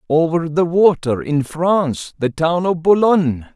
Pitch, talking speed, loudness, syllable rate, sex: 160 Hz, 120 wpm, -17 LUFS, 4.3 syllables/s, male